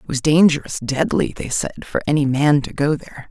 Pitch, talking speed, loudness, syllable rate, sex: 145 Hz, 220 wpm, -19 LUFS, 5.8 syllables/s, female